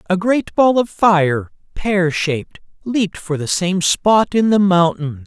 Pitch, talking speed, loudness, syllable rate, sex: 185 Hz, 170 wpm, -16 LUFS, 3.9 syllables/s, male